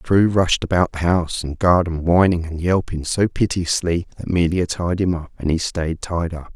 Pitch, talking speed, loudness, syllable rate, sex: 85 Hz, 210 wpm, -20 LUFS, 5.0 syllables/s, male